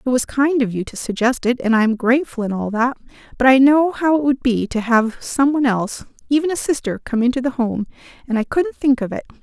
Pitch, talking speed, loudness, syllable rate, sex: 250 Hz, 255 wpm, -18 LUFS, 6.0 syllables/s, female